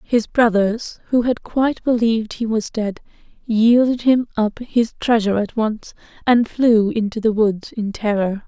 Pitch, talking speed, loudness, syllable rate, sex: 225 Hz, 165 wpm, -18 LUFS, 4.4 syllables/s, female